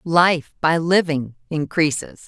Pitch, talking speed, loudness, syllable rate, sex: 160 Hz, 105 wpm, -20 LUFS, 3.6 syllables/s, female